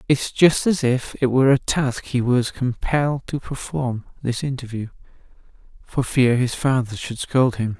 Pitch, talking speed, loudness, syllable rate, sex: 125 Hz, 155 wpm, -21 LUFS, 4.4 syllables/s, male